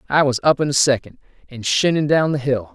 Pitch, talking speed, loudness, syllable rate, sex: 135 Hz, 240 wpm, -18 LUFS, 5.8 syllables/s, male